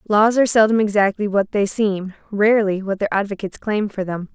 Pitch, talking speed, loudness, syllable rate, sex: 205 Hz, 195 wpm, -19 LUFS, 5.8 syllables/s, female